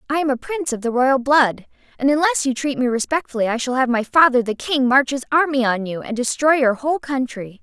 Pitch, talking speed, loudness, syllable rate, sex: 265 Hz, 245 wpm, -19 LUFS, 6.0 syllables/s, female